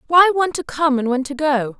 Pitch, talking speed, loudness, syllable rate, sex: 285 Hz, 265 wpm, -18 LUFS, 6.3 syllables/s, female